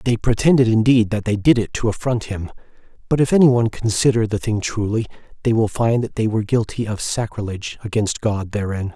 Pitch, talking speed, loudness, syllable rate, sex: 110 Hz, 200 wpm, -19 LUFS, 5.9 syllables/s, male